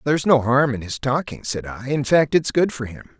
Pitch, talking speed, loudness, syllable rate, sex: 135 Hz, 265 wpm, -20 LUFS, 5.4 syllables/s, male